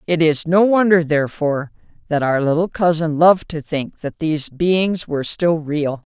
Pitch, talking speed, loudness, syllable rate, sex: 160 Hz, 175 wpm, -18 LUFS, 4.9 syllables/s, female